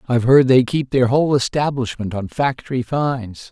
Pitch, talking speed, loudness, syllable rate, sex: 125 Hz, 170 wpm, -18 LUFS, 5.4 syllables/s, male